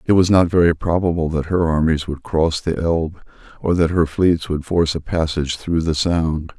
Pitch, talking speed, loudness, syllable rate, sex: 80 Hz, 210 wpm, -18 LUFS, 5.1 syllables/s, male